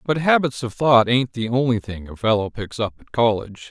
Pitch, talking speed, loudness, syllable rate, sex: 120 Hz, 225 wpm, -20 LUFS, 5.3 syllables/s, male